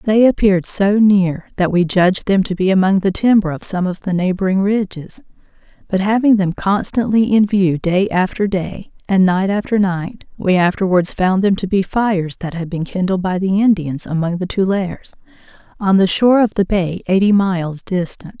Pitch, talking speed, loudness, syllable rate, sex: 190 Hz, 190 wpm, -16 LUFS, 5.0 syllables/s, female